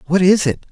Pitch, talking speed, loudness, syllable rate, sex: 175 Hz, 250 wpm, -15 LUFS, 5.8 syllables/s, male